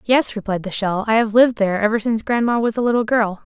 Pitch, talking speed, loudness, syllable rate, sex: 220 Hz, 255 wpm, -18 LUFS, 6.6 syllables/s, female